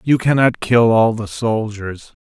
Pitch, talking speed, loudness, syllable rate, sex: 115 Hz, 160 wpm, -16 LUFS, 3.9 syllables/s, male